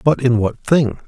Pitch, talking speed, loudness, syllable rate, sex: 125 Hz, 220 wpm, -16 LUFS, 4.3 syllables/s, male